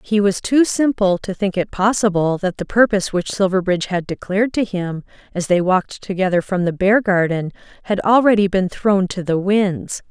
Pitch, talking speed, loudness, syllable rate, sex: 195 Hz, 185 wpm, -18 LUFS, 5.2 syllables/s, female